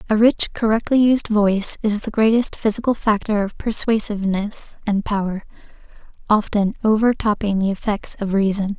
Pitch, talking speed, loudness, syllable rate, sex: 210 Hz, 145 wpm, -19 LUFS, 5.2 syllables/s, female